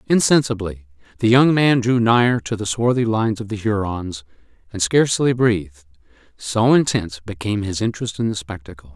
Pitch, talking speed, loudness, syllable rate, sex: 105 Hz, 160 wpm, -19 LUFS, 5.7 syllables/s, male